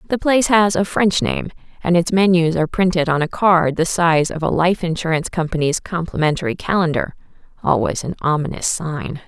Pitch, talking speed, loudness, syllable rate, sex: 170 Hz, 175 wpm, -18 LUFS, 5.5 syllables/s, female